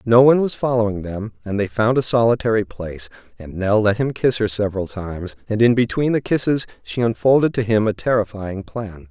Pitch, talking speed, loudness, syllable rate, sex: 110 Hz, 205 wpm, -19 LUFS, 5.6 syllables/s, male